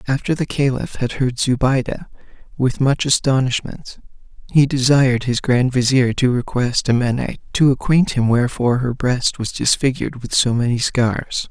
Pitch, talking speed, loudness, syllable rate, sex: 130 Hz, 150 wpm, -18 LUFS, 4.9 syllables/s, male